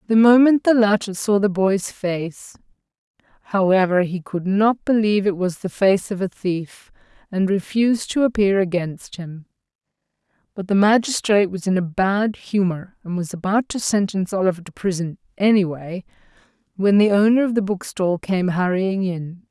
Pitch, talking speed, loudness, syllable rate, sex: 195 Hz, 165 wpm, -19 LUFS, 4.9 syllables/s, female